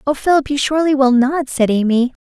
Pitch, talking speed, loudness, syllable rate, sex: 270 Hz, 215 wpm, -15 LUFS, 5.9 syllables/s, female